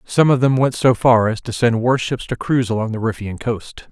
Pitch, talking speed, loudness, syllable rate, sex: 120 Hz, 245 wpm, -18 LUFS, 5.3 syllables/s, male